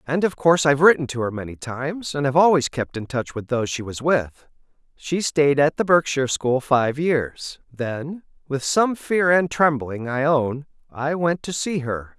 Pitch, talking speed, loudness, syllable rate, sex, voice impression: 145 Hz, 190 wpm, -21 LUFS, 4.6 syllables/s, male, masculine, adult-like, tensed, slightly powerful, bright, clear, cool, calm, friendly, wild, lively, kind